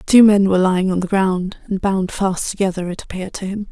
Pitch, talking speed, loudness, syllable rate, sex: 190 Hz, 245 wpm, -18 LUFS, 5.9 syllables/s, female